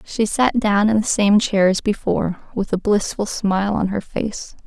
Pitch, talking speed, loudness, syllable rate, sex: 205 Hz, 205 wpm, -19 LUFS, 4.6 syllables/s, female